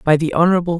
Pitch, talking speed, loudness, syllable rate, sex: 170 Hz, 225 wpm, -16 LUFS, 8.1 syllables/s, female